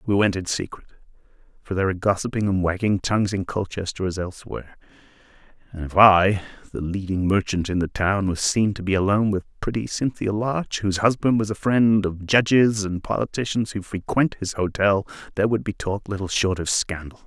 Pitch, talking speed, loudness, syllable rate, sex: 100 Hz, 190 wpm, -22 LUFS, 5.7 syllables/s, male